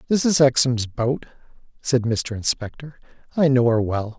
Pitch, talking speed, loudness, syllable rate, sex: 125 Hz, 160 wpm, -21 LUFS, 4.6 syllables/s, male